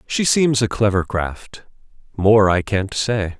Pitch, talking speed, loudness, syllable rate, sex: 105 Hz, 160 wpm, -18 LUFS, 3.6 syllables/s, male